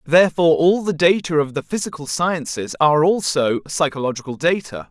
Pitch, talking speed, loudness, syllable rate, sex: 160 Hz, 145 wpm, -18 LUFS, 5.5 syllables/s, male